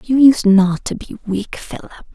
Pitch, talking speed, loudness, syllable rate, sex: 220 Hz, 195 wpm, -15 LUFS, 4.6 syllables/s, female